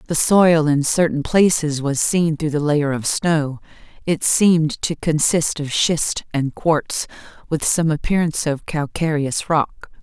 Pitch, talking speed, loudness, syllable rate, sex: 155 Hz, 155 wpm, -18 LUFS, 4.0 syllables/s, female